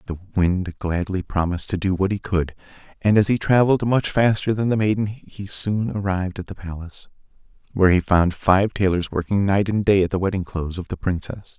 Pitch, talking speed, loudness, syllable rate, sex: 95 Hz, 205 wpm, -21 LUFS, 5.5 syllables/s, male